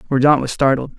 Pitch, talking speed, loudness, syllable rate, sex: 135 Hz, 185 wpm, -16 LUFS, 6.9 syllables/s, male